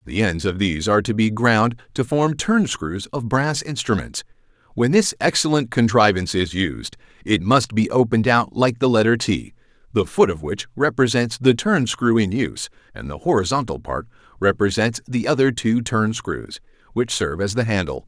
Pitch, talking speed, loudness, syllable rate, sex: 115 Hz, 175 wpm, -20 LUFS, 5.1 syllables/s, male